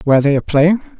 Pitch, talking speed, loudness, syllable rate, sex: 150 Hz, 240 wpm, -14 LUFS, 7.9 syllables/s, male